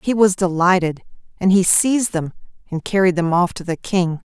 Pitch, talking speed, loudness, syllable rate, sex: 180 Hz, 195 wpm, -18 LUFS, 5.2 syllables/s, female